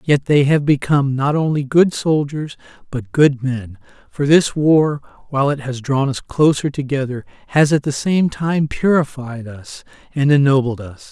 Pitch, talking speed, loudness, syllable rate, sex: 140 Hz, 165 wpm, -17 LUFS, 4.5 syllables/s, male